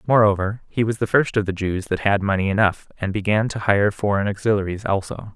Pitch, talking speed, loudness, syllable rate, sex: 105 Hz, 215 wpm, -21 LUFS, 5.7 syllables/s, male